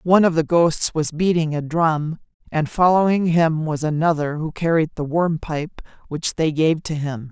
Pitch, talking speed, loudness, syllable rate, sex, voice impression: 160 Hz, 190 wpm, -20 LUFS, 4.6 syllables/s, female, very feminine, slightly middle-aged, slightly thin, tensed, slightly powerful, slightly dark, slightly soft, clear, slightly fluent, slightly raspy, slightly cool, intellectual, slightly refreshing, sincere, calm, slightly friendly, reassuring, unique, slightly elegant, slightly wild, sweet, lively, strict, slightly intense, slightly sharp, modest